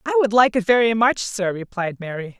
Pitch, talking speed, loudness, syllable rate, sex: 215 Hz, 225 wpm, -19 LUFS, 5.4 syllables/s, female